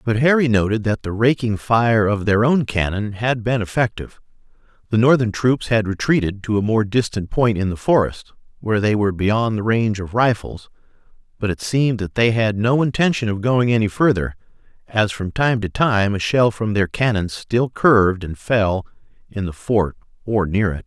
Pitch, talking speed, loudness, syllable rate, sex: 110 Hz, 195 wpm, -19 LUFS, 5.1 syllables/s, male